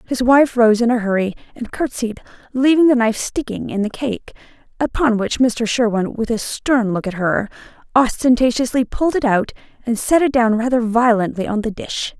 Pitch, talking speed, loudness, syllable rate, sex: 235 Hz, 185 wpm, -17 LUFS, 5.2 syllables/s, female